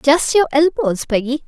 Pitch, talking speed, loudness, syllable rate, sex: 285 Hz, 165 wpm, -16 LUFS, 4.4 syllables/s, female